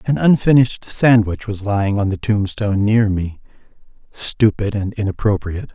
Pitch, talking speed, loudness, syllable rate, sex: 105 Hz, 135 wpm, -17 LUFS, 5.0 syllables/s, male